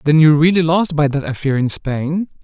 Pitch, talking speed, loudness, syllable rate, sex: 155 Hz, 220 wpm, -16 LUFS, 5.0 syllables/s, male